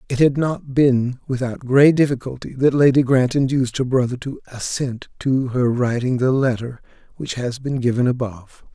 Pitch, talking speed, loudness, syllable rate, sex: 130 Hz, 170 wpm, -19 LUFS, 4.9 syllables/s, male